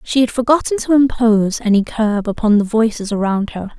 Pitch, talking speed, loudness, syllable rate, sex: 225 Hz, 190 wpm, -16 LUFS, 5.3 syllables/s, female